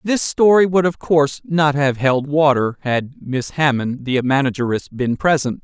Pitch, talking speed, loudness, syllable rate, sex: 140 Hz, 170 wpm, -17 LUFS, 4.4 syllables/s, male